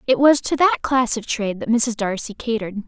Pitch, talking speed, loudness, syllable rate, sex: 235 Hz, 230 wpm, -19 LUFS, 5.6 syllables/s, female